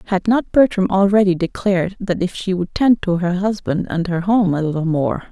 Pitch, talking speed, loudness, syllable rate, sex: 190 Hz, 215 wpm, -18 LUFS, 5.4 syllables/s, female